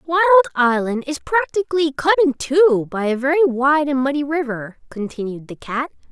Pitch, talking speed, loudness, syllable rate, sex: 285 Hz, 165 wpm, -18 LUFS, 5.1 syllables/s, female